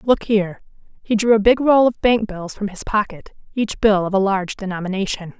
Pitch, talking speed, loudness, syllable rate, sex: 205 Hz, 210 wpm, -19 LUFS, 5.6 syllables/s, female